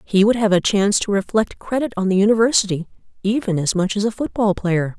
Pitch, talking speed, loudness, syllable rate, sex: 205 Hz, 230 wpm, -19 LUFS, 6.0 syllables/s, female